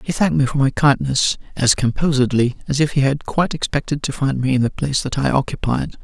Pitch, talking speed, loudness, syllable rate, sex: 135 Hz, 230 wpm, -18 LUFS, 6.1 syllables/s, male